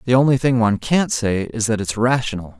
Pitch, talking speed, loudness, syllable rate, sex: 115 Hz, 230 wpm, -18 LUFS, 5.8 syllables/s, male